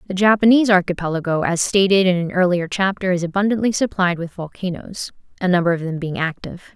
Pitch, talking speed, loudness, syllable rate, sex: 185 Hz, 180 wpm, -18 LUFS, 6.2 syllables/s, female